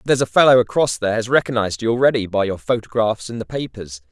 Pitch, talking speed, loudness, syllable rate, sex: 115 Hz, 220 wpm, -18 LUFS, 6.9 syllables/s, male